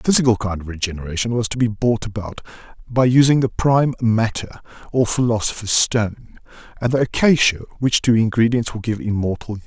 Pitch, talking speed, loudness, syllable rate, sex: 115 Hz, 175 wpm, -19 LUFS, 6.0 syllables/s, male